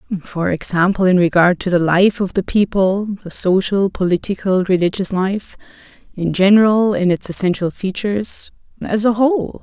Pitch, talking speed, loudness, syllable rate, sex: 195 Hz, 130 wpm, -16 LUFS, 4.9 syllables/s, female